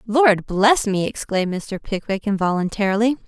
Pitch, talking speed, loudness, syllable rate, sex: 210 Hz, 130 wpm, -20 LUFS, 4.9 syllables/s, female